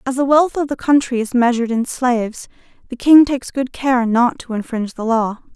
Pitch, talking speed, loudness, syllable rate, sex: 250 Hz, 215 wpm, -17 LUFS, 5.5 syllables/s, female